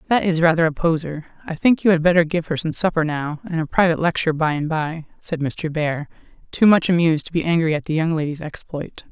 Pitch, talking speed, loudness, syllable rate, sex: 165 Hz, 235 wpm, -20 LUFS, 6.0 syllables/s, female